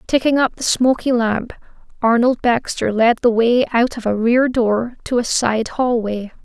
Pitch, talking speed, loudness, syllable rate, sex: 235 Hz, 175 wpm, -17 LUFS, 4.3 syllables/s, female